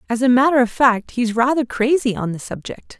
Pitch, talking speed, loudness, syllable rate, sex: 245 Hz, 220 wpm, -17 LUFS, 5.3 syllables/s, female